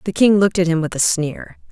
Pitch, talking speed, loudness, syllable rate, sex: 180 Hz, 280 wpm, -17 LUFS, 6.0 syllables/s, female